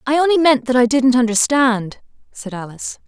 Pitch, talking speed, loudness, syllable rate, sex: 250 Hz, 175 wpm, -15 LUFS, 5.3 syllables/s, female